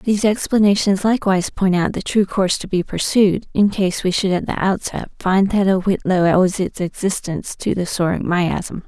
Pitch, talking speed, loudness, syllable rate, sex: 190 Hz, 195 wpm, -18 LUFS, 5.1 syllables/s, female